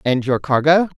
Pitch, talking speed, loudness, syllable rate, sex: 150 Hz, 185 wpm, -16 LUFS, 4.9 syllables/s, female